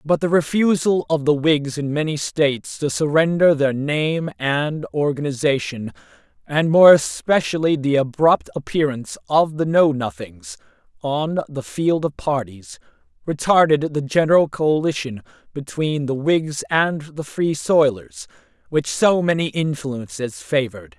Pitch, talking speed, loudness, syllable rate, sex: 150 Hz, 130 wpm, -19 LUFS, 4.3 syllables/s, male